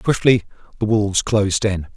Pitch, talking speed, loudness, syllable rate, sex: 105 Hz, 155 wpm, -18 LUFS, 5.2 syllables/s, male